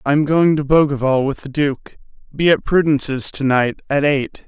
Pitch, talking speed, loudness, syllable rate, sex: 145 Hz, 200 wpm, -17 LUFS, 4.9 syllables/s, male